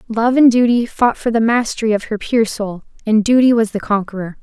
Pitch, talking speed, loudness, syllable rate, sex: 225 Hz, 215 wpm, -15 LUFS, 5.5 syllables/s, female